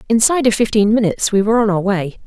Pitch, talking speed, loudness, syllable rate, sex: 215 Hz, 240 wpm, -15 LUFS, 7.4 syllables/s, female